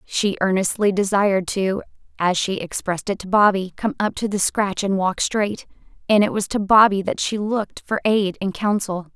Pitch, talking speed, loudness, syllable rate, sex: 200 Hz, 185 wpm, -20 LUFS, 5.0 syllables/s, female